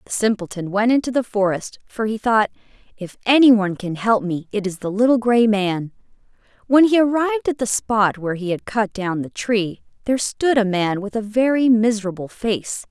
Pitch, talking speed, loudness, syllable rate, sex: 220 Hz, 195 wpm, -19 LUFS, 5.2 syllables/s, female